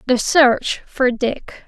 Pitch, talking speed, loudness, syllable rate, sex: 255 Hz, 145 wpm, -17 LUFS, 2.7 syllables/s, female